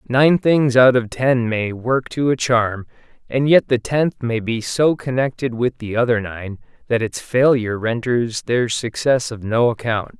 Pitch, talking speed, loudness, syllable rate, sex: 120 Hz, 180 wpm, -18 LUFS, 4.2 syllables/s, male